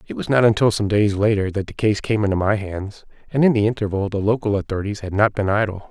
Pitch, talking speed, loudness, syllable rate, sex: 105 Hz, 255 wpm, -20 LUFS, 6.3 syllables/s, male